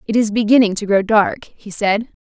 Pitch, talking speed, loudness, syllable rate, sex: 210 Hz, 215 wpm, -16 LUFS, 5.1 syllables/s, female